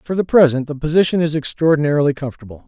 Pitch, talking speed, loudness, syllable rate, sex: 150 Hz, 180 wpm, -16 LUFS, 7.2 syllables/s, male